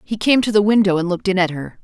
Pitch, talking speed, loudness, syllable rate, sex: 195 Hz, 325 wpm, -17 LUFS, 6.9 syllables/s, female